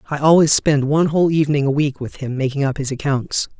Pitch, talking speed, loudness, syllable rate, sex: 145 Hz, 235 wpm, -17 LUFS, 6.4 syllables/s, male